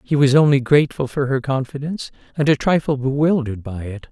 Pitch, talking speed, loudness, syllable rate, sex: 135 Hz, 190 wpm, -18 LUFS, 6.1 syllables/s, male